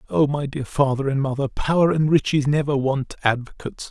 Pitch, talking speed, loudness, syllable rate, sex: 140 Hz, 185 wpm, -21 LUFS, 5.5 syllables/s, male